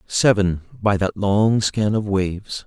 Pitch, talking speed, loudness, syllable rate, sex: 100 Hz, 160 wpm, -20 LUFS, 4.3 syllables/s, male